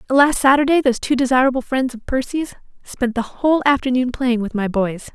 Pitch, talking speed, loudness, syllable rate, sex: 255 Hz, 185 wpm, -18 LUFS, 5.6 syllables/s, female